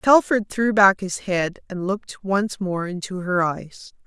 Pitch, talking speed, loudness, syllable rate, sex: 195 Hz, 175 wpm, -21 LUFS, 3.9 syllables/s, female